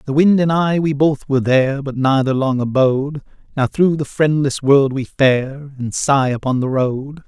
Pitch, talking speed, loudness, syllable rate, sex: 140 Hz, 200 wpm, -16 LUFS, 4.6 syllables/s, male